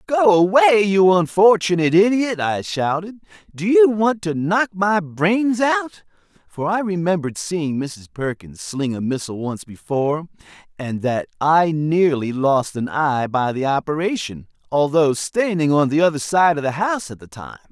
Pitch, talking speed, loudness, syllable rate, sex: 170 Hz, 165 wpm, -19 LUFS, 4.6 syllables/s, male